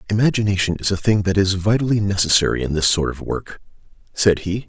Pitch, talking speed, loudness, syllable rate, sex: 100 Hz, 190 wpm, -19 LUFS, 6.2 syllables/s, male